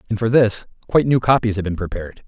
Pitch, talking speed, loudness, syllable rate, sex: 110 Hz, 235 wpm, -18 LUFS, 7.0 syllables/s, male